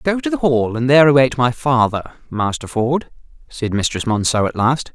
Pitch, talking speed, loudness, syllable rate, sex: 130 Hz, 195 wpm, -17 LUFS, 5.1 syllables/s, male